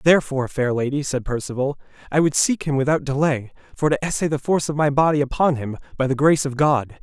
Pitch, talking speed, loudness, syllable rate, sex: 140 Hz, 220 wpm, -21 LUFS, 6.4 syllables/s, male